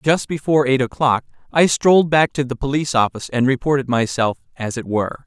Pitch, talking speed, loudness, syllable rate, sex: 135 Hz, 195 wpm, -18 LUFS, 6.1 syllables/s, male